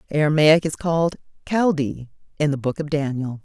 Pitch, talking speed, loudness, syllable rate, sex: 150 Hz, 155 wpm, -21 LUFS, 5.4 syllables/s, female